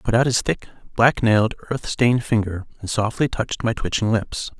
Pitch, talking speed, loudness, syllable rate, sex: 115 Hz, 210 wpm, -21 LUFS, 5.7 syllables/s, male